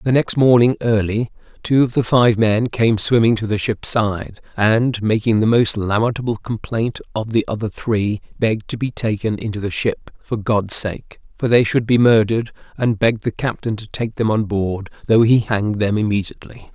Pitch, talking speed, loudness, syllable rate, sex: 110 Hz, 195 wpm, -18 LUFS, 5.0 syllables/s, male